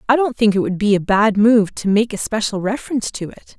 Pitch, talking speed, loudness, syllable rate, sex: 215 Hz, 270 wpm, -17 LUFS, 5.8 syllables/s, female